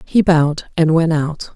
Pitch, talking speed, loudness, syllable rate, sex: 160 Hz, 195 wpm, -16 LUFS, 4.3 syllables/s, female